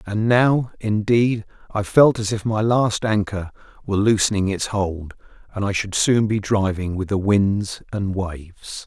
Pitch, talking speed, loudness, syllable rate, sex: 105 Hz, 170 wpm, -20 LUFS, 4.2 syllables/s, male